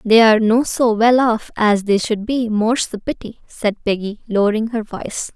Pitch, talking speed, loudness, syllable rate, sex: 220 Hz, 200 wpm, -17 LUFS, 4.9 syllables/s, female